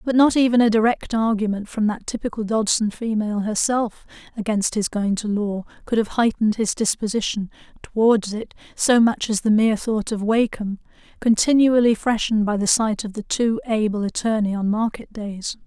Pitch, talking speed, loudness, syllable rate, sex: 220 Hz, 170 wpm, -21 LUFS, 5.2 syllables/s, female